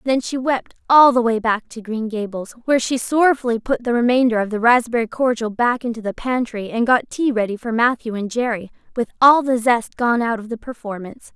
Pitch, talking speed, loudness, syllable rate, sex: 235 Hz, 215 wpm, -19 LUFS, 5.6 syllables/s, female